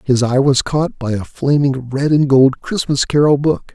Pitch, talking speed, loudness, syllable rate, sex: 135 Hz, 210 wpm, -15 LUFS, 4.4 syllables/s, male